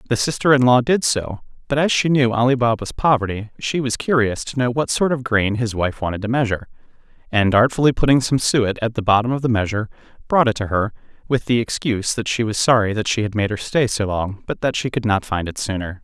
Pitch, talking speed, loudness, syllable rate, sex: 115 Hz, 245 wpm, -19 LUFS, 5.9 syllables/s, male